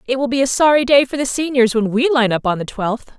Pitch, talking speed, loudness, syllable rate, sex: 250 Hz, 300 wpm, -16 LUFS, 6.0 syllables/s, female